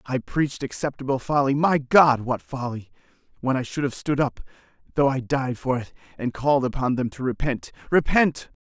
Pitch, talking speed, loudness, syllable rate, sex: 135 Hz, 160 wpm, -23 LUFS, 5.2 syllables/s, male